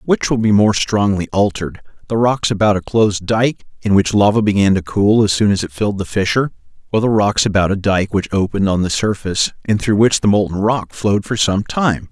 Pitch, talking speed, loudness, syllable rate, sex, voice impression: 105 Hz, 230 wpm, -16 LUFS, 5.7 syllables/s, male, masculine, adult-like, thick, tensed, powerful, clear, fluent, wild, lively, strict, intense